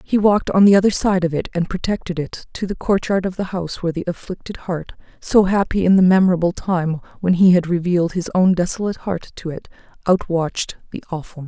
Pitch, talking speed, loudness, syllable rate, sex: 180 Hz, 205 wpm, -19 LUFS, 6.1 syllables/s, female